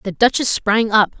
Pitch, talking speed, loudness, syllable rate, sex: 215 Hz, 200 wpm, -16 LUFS, 4.6 syllables/s, female